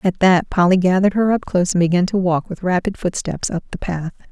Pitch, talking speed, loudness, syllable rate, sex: 185 Hz, 235 wpm, -18 LUFS, 6.0 syllables/s, female